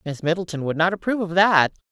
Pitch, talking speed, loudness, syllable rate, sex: 175 Hz, 220 wpm, -21 LUFS, 6.7 syllables/s, female